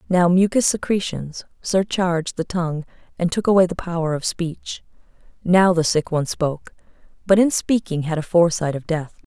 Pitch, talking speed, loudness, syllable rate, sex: 175 Hz, 170 wpm, -20 LUFS, 5.3 syllables/s, female